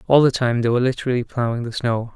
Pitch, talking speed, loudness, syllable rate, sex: 120 Hz, 250 wpm, -20 LUFS, 7.0 syllables/s, male